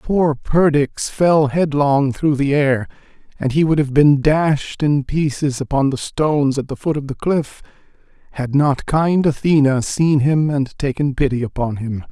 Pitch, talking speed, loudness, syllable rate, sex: 145 Hz, 175 wpm, -17 LUFS, 4.2 syllables/s, male